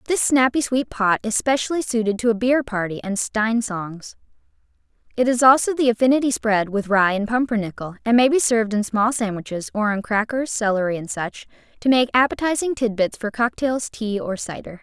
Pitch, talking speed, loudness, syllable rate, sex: 225 Hz, 185 wpm, -20 LUFS, 5.4 syllables/s, female